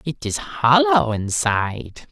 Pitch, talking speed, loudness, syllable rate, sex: 140 Hz, 115 wpm, -19 LUFS, 3.5 syllables/s, male